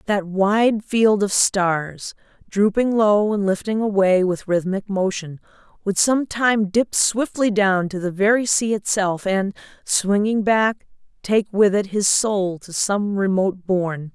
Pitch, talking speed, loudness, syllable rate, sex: 200 Hz, 150 wpm, -19 LUFS, 4.0 syllables/s, female